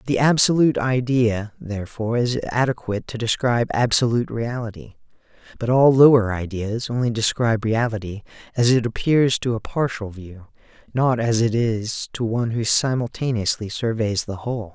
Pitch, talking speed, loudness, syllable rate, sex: 115 Hz, 140 wpm, -21 LUFS, 5.2 syllables/s, male